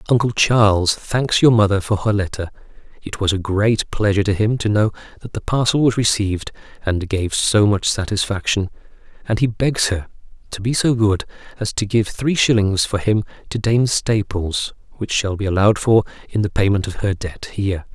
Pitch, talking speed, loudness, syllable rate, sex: 105 Hz, 190 wpm, -18 LUFS, 5.2 syllables/s, male